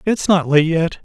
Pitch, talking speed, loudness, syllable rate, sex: 170 Hz, 290 wpm, -15 LUFS, 5.6 syllables/s, male